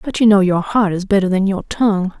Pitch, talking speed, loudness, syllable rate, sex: 200 Hz, 275 wpm, -15 LUFS, 5.8 syllables/s, female